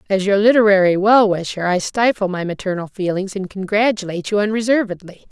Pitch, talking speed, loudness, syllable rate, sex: 200 Hz, 160 wpm, -17 LUFS, 6.0 syllables/s, female